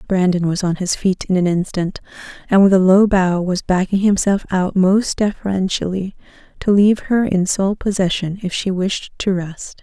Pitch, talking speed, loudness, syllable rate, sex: 190 Hz, 185 wpm, -17 LUFS, 4.8 syllables/s, female